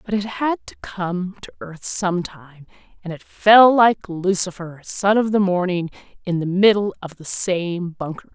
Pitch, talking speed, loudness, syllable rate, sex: 185 Hz, 175 wpm, -19 LUFS, 4.4 syllables/s, female